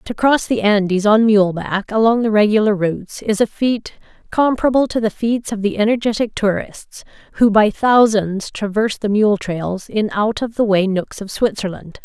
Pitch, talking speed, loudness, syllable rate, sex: 210 Hz, 185 wpm, -17 LUFS, 4.8 syllables/s, female